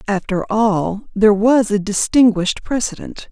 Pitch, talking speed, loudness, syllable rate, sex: 210 Hz, 125 wpm, -16 LUFS, 4.5 syllables/s, female